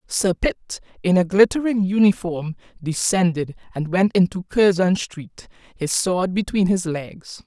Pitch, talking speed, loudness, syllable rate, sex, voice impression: 180 Hz, 135 wpm, -20 LUFS, 4.1 syllables/s, female, slightly masculine, slightly feminine, very gender-neutral, adult-like, slightly thin, tensed, powerful, bright, slightly soft, very clear, fluent, cool, very intellectual, sincere, calm, slightly friendly, slightly reassuring, very unique, slightly elegant, slightly sweet, lively, slightly strict, slightly intense